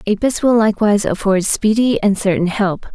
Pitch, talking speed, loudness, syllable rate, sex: 210 Hz, 165 wpm, -15 LUFS, 5.4 syllables/s, female